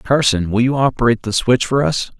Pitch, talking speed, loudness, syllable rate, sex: 120 Hz, 220 wpm, -16 LUFS, 5.7 syllables/s, male